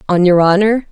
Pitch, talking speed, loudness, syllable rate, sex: 190 Hz, 195 wpm, -11 LUFS, 5.6 syllables/s, female